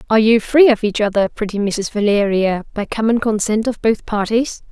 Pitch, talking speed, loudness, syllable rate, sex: 215 Hz, 190 wpm, -16 LUFS, 5.3 syllables/s, female